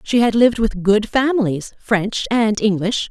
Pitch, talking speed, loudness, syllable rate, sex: 220 Hz, 175 wpm, -17 LUFS, 4.5 syllables/s, female